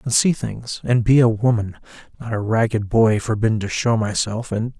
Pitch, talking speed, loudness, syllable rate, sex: 115 Hz, 200 wpm, -19 LUFS, 5.0 syllables/s, male